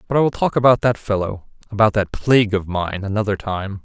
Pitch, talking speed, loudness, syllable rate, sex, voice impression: 105 Hz, 220 wpm, -19 LUFS, 5.9 syllables/s, male, masculine, adult-like, tensed, powerful, clear, slightly fluent, cool, intellectual, calm, friendly, wild, lively, slightly strict